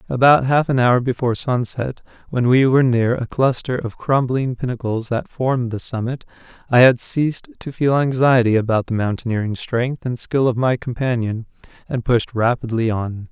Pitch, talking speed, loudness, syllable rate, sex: 125 Hz, 170 wpm, -19 LUFS, 5.1 syllables/s, male